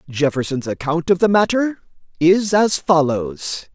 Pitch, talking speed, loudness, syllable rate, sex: 170 Hz, 130 wpm, -18 LUFS, 4.2 syllables/s, male